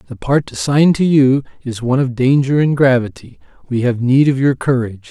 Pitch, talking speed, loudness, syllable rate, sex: 130 Hz, 200 wpm, -14 LUFS, 5.6 syllables/s, male